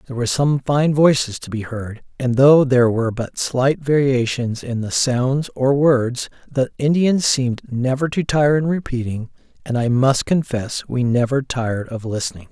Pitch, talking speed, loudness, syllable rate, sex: 130 Hz, 175 wpm, -18 LUFS, 4.7 syllables/s, male